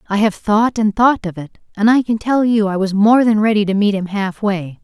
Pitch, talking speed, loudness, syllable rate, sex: 210 Hz, 260 wpm, -15 LUFS, 5.2 syllables/s, female